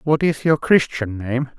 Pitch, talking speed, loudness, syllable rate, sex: 135 Hz, 190 wpm, -19 LUFS, 4.1 syllables/s, male